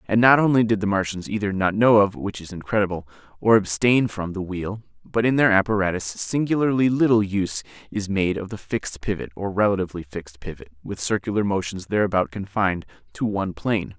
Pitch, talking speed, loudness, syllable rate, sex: 100 Hz, 185 wpm, -22 LUFS, 5.7 syllables/s, male